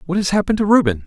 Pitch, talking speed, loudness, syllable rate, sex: 185 Hz, 280 wpm, -16 LUFS, 8.6 syllables/s, male